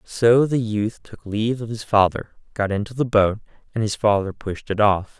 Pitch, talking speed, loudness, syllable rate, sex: 105 Hz, 210 wpm, -21 LUFS, 4.9 syllables/s, male